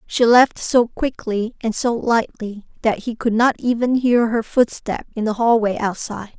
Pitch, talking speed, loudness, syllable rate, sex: 230 Hz, 180 wpm, -19 LUFS, 4.4 syllables/s, female